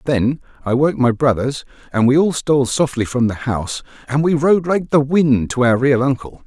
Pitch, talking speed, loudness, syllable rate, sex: 135 Hz, 215 wpm, -17 LUFS, 5.1 syllables/s, male